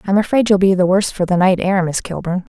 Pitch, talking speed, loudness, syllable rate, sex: 190 Hz, 280 wpm, -16 LUFS, 6.4 syllables/s, female